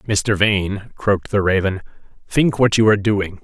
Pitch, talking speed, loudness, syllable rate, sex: 100 Hz, 175 wpm, -18 LUFS, 4.5 syllables/s, male